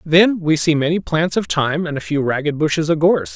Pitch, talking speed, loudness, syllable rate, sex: 150 Hz, 250 wpm, -17 LUFS, 5.9 syllables/s, male